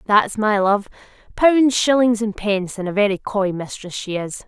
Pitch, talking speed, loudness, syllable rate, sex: 210 Hz, 175 wpm, -19 LUFS, 4.7 syllables/s, female